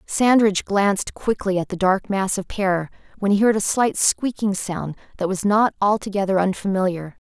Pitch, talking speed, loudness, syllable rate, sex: 195 Hz, 175 wpm, -20 LUFS, 4.9 syllables/s, female